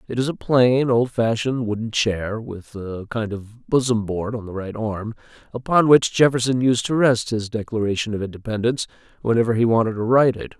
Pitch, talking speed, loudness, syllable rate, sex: 115 Hz, 185 wpm, -20 LUFS, 5.4 syllables/s, male